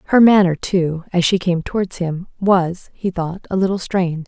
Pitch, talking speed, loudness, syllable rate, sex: 180 Hz, 195 wpm, -18 LUFS, 4.7 syllables/s, female